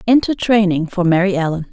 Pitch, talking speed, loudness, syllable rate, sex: 190 Hz, 175 wpm, -16 LUFS, 5.8 syllables/s, female